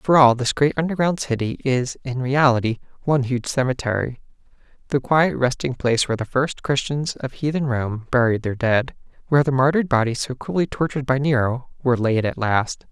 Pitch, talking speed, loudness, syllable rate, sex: 130 Hz, 180 wpm, -21 LUFS, 5.6 syllables/s, male